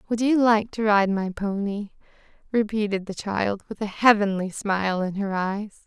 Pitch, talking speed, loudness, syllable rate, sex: 205 Hz, 175 wpm, -23 LUFS, 4.6 syllables/s, female